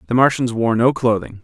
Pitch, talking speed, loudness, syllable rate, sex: 115 Hz, 210 wpm, -17 LUFS, 5.6 syllables/s, male